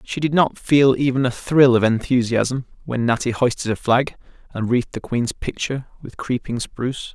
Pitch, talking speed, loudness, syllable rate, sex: 125 Hz, 185 wpm, -20 LUFS, 5.0 syllables/s, male